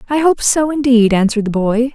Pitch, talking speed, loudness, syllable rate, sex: 245 Hz, 215 wpm, -14 LUFS, 5.7 syllables/s, female